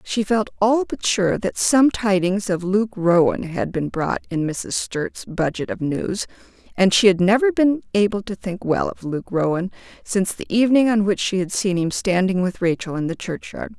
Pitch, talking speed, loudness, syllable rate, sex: 195 Hz, 205 wpm, -20 LUFS, 4.7 syllables/s, female